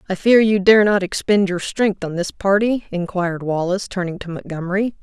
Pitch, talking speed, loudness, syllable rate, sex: 190 Hz, 190 wpm, -18 LUFS, 5.5 syllables/s, female